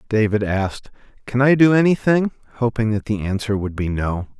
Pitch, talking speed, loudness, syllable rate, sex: 110 Hz, 165 wpm, -19 LUFS, 5.3 syllables/s, male